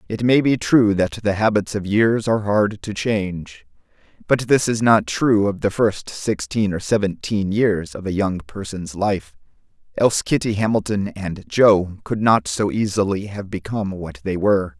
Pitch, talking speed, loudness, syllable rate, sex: 105 Hz, 180 wpm, -20 LUFS, 4.5 syllables/s, male